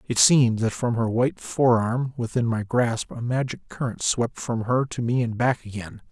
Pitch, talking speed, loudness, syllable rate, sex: 120 Hz, 205 wpm, -23 LUFS, 4.8 syllables/s, male